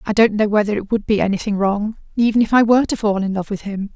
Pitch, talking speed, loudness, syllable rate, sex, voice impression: 210 Hz, 290 wpm, -18 LUFS, 6.6 syllables/s, female, very feminine, very adult-like, thin, slightly tensed, slightly weak, dark, slightly soft, very clear, fluent, slightly raspy, cute, slightly cool, intellectual, very refreshing, sincere, calm, friendly, very reassuring, unique, very elegant, slightly wild, sweet, lively, kind, slightly intense, slightly sharp, slightly modest, light